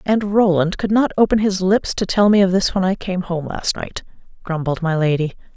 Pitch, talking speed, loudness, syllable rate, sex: 185 Hz, 225 wpm, -18 LUFS, 5.2 syllables/s, female